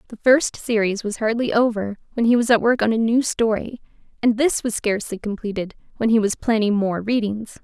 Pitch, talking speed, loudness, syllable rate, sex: 220 Hz, 205 wpm, -20 LUFS, 5.4 syllables/s, female